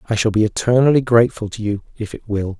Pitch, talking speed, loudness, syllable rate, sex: 110 Hz, 230 wpm, -17 LUFS, 6.4 syllables/s, male